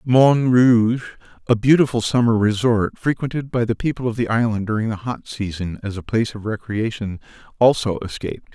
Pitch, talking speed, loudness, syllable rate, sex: 115 Hz, 170 wpm, -19 LUFS, 5.6 syllables/s, male